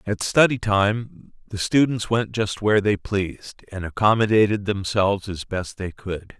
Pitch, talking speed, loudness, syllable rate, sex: 105 Hz, 160 wpm, -22 LUFS, 4.4 syllables/s, male